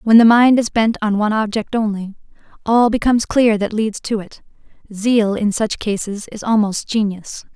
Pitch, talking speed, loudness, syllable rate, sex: 215 Hz, 185 wpm, -17 LUFS, 4.9 syllables/s, female